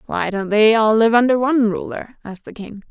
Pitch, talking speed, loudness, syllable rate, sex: 220 Hz, 225 wpm, -16 LUFS, 5.6 syllables/s, female